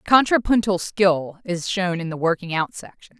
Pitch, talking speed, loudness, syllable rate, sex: 185 Hz, 170 wpm, -21 LUFS, 4.6 syllables/s, female